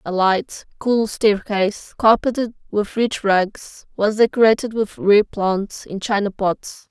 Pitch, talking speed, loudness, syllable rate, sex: 210 Hz, 140 wpm, -19 LUFS, 3.8 syllables/s, female